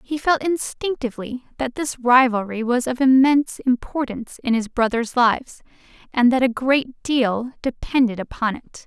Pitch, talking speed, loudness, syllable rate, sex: 250 Hz, 150 wpm, -20 LUFS, 4.8 syllables/s, female